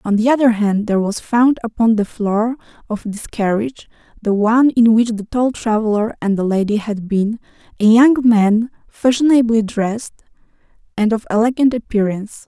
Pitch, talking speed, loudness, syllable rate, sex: 225 Hz, 155 wpm, -16 LUFS, 5.2 syllables/s, female